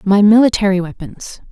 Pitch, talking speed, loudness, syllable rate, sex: 200 Hz, 120 wpm, -12 LUFS, 5.2 syllables/s, female